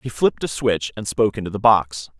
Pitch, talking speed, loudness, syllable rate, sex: 105 Hz, 245 wpm, -20 LUFS, 5.8 syllables/s, male